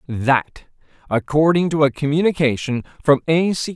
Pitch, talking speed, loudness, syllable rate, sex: 150 Hz, 130 wpm, -18 LUFS, 4.7 syllables/s, male